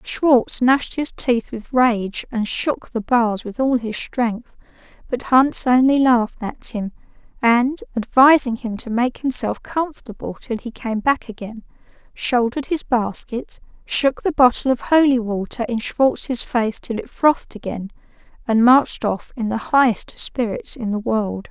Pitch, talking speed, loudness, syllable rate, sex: 240 Hz, 160 wpm, -19 LUFS, 4.2 syllables/s, female